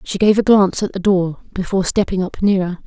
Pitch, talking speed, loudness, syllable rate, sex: 190 Hz, 230 wpm, -17 LUFS, 6.0 syllables/s, female